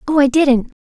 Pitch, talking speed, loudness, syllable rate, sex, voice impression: 275 Hz, 215 wpm, -14 LUFS, 5.1 syllables/s, female, very feminine, slightly young, very thin, tensed, slightly powerful, bright, slightly hard, clear, fluent, slightly raspy, very cute, slightly intellectual, very refreshing, sincere, calm, very unique, elegant, slightly wild, very sweet, very lively, kind, slightly intense, sharp, very light